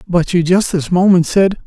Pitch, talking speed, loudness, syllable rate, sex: 180 Hz, 215 wpm, -13 LUFS, 5.0 syllables/s, male